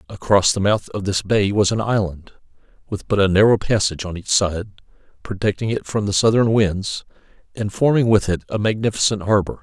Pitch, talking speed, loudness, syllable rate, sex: 105 Hz, 185 wpm, -19 LUFS, 5.6 syllables/s, male